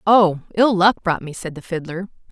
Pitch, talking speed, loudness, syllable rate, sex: 185 Hz, 210 wpm, -19 LUFS, 5.2 syllables/s, female